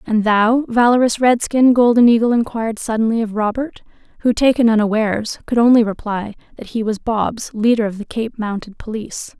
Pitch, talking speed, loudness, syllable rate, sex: 225 Hz, 165 wpm, -16 LUFS, 5.4 syllables/s, female